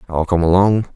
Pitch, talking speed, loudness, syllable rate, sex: 90 Hz, 190 wpm, -15 LUFS, 5.4 syllables/s, male